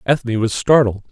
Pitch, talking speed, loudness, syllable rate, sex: 120 Hz, 160 wpm, -16 LUFS, 5.4 syllables/s, male